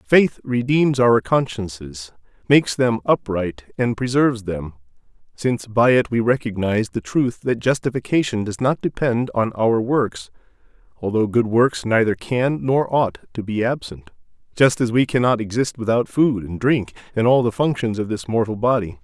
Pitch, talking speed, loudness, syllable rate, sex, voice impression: 115 Hz, 165 wpm, -20 LUFS, 4.7 syllables/s, male, masculine, middle-aged, thick, tensed, powerful, hard, fluent, cool, intellectual, slightly mature, wild, lively, strict, intense, slightly sharp